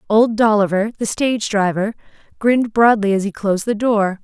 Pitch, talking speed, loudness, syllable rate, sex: 215 Hz, 170 wpm, -17 LUFS, 5.4 syllables/s, female